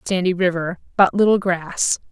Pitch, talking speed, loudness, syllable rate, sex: 185 Hz, 115 wpm, -19 LUFS, 4.9 syllables/s, female